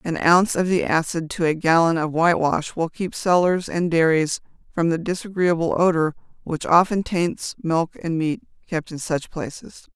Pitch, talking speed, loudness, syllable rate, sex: 170 Hz, 175 wpm, -21 LUFS, 4.7 syllables/s, female